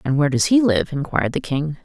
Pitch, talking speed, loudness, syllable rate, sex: 160 Hz, 260 wpm, -19 LUFS, 6.4 syllables/s, female